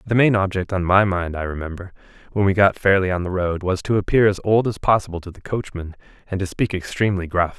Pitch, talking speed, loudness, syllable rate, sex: 95 Hz, 235 wpm, -20 LUFS, 6.2 syllables/s, male